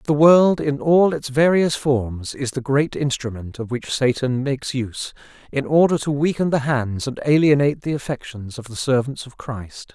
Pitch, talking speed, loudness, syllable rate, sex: 135 Hz, 185 wpm, -20 LUFS, 4.9 syllables/s, male